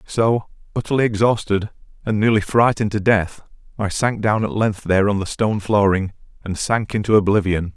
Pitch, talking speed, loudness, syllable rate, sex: 105 Hz, 170 wpm, -19 LUFS, 5.4 syllables/s, male